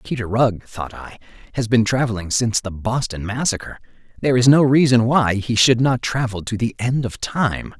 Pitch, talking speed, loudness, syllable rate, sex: 115 Hz, 200 wpm, -19 LUFS, 5.3 syllables/s, male